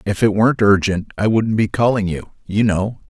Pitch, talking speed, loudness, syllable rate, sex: 105 Hz, 210 wpm, -17 LUFS, 5.1 syllables/s, male